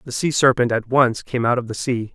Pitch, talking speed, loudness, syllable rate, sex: 125 Hz, 280 wpm, -19 LUFS, 5.4 syllables/s, male